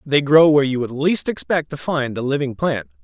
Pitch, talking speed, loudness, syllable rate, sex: 135 Hz, 235 wpm, -18 LUFS, 5.3 syllables/s, male